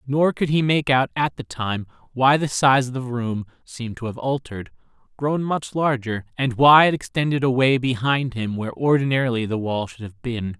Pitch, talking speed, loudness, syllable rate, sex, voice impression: 125 Hz, 200 wpm, -21 LUFS, 5.1 syllables/s, male, masculine, adult-like, tensed, slightly clear, intellectual, refreshing